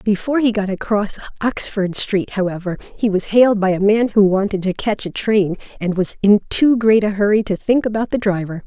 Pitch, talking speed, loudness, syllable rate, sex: 205 Hz, 215 wpm, -17 LUFS, 5.3 syllables/s, female